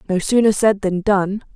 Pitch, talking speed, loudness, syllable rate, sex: 200 Hz, 195 wpm, -17 LUFS, 4.7 syllables/s, female